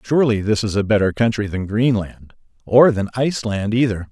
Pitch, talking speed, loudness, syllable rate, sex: 110 Hz, 175 wpm, -18 LUFS, 5.5 syllables/s, male